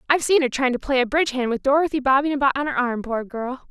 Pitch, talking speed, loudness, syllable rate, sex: 270 Hz, 275 wpm, -21 LUFS, 7.0 syllables/s, female